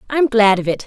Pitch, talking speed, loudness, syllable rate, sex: 220 Hz, 275 wpm, -15 LUFS, 5.8 syllables/s, female